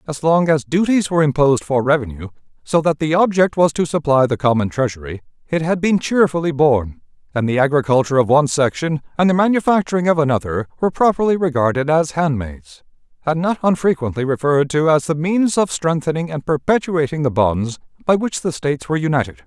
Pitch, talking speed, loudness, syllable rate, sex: 150 Hz, 180 wpm, -17 LUFS, 6.1 syllables/s, male